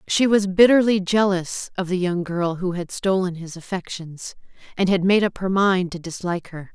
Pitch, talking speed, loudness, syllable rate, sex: 185 Hz, 195 wpm, -21 LUFS, 4.9 syllables/s, female